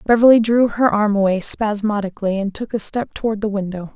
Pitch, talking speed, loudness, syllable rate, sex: 210 Hz, 195 wpm, -18 LUFS, 5.7 syllables/s, female